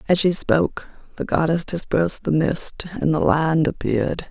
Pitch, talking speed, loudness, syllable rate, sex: 160 Hz, 165 wpm, -21 LUFS, 5.0 syllables/s, female